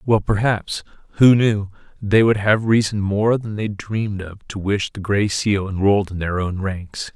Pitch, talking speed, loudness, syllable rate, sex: 100 Hz, 195 wpm, -19 LUFS, 4.4 syllables/s, male